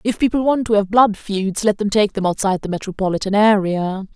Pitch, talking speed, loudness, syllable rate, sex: 205 Hz, 215 wpm, -18 LUFS, 5.7 syllables/s, female